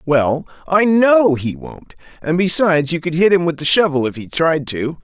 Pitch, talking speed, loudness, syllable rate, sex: 160 Hz, 215 wpm, -16 LUFS, 4.7 syllables/s, male